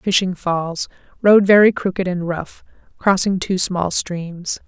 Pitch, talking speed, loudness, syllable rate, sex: 185 Hz, 130 wpm, -18 LUFS, 3.8 syllables/s, female